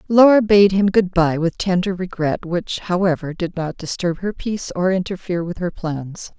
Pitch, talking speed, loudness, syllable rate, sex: 180 Hz, 190 wpm, -19 LUFS, 4.9 syllables/s, female